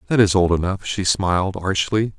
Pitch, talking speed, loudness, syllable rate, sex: 95 Hz, 190 wpm, -19 LUFS, 5.2 syllables/s, male